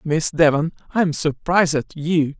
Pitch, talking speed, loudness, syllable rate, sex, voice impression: 160 Hz, 150 wpm, -19 LUFS, 4.6 syllables/s, male, masculine, adult-like, slightly middle-aged, slightly thick, relaxed, slightly weak, slightly dark, slightly hard, slightly muffled, slightly halting, slightly cool, intellectual, very sincere, very calm, friendly, unique, elegant, slightly sweet, very kind, very modest